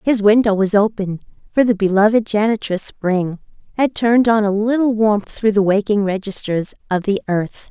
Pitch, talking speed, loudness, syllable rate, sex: 210 Hz, 170 wpm, -17 LUFS, 5.0 syllables/s, female